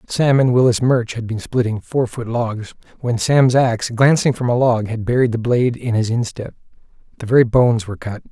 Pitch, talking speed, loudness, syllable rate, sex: 120 Hz, 210 wpm, -17 LUFS, 5.4 syllables/s, male